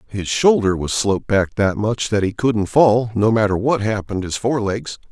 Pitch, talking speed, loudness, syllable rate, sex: 105 Hz, 210 wpm, -18 LUFS, 4.9 syllables/s, male